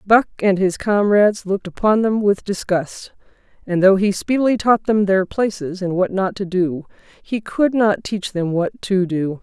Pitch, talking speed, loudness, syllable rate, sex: 195 Hz, 190 wpm, -18 LUFS, 4.5 syllables/s, female